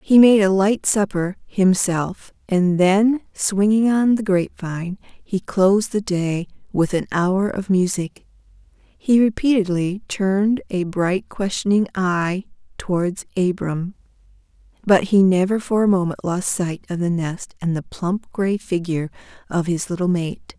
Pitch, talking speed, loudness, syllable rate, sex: 190 Hz, 150 wpm, -20 LUFS, 4.1 syllables/s, female